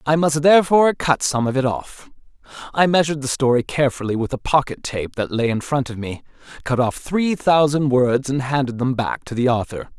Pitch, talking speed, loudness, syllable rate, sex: 135 Hz, 210 wpm, -19 LUFS, 5.5 syllables/s, male